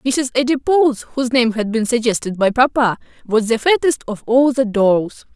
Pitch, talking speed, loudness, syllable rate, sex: 240 Hz, 180 wpm, -16 LUFS, 4.9 syllables/s, female